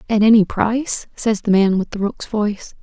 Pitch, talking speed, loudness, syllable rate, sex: 210 Hz, 215 wpm, -18 LUFS, 5.1 syllables/s, female